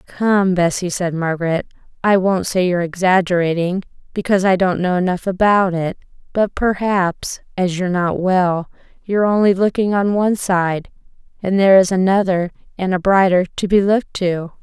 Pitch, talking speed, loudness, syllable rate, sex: 185 Hz, 160 wpm, -17 LUFS, 5.1 syllables/s, female